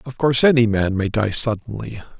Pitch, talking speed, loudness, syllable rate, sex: 115 Hz, 190 wpm, -18 LUFS, 5.8 syllables/s, male